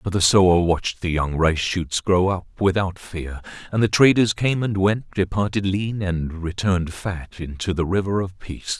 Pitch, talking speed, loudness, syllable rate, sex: 95 Hz, 190 wpm, -21 LUFS, 4.7 syllables/s, male